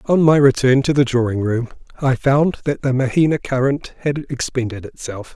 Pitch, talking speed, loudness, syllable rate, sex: 135 Hz, 180 wpm, -18 LUFS, 5.1 syllables/s, male